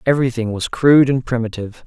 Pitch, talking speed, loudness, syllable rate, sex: 125 Hz, 160 wpm, -17 LUFS, 6.9 syllables/s, male